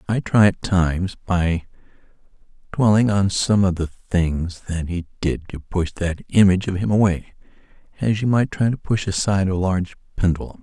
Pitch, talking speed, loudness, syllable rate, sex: 95 Hz, 175 wpm, -20 LUFS, 4.9 syllables/s, male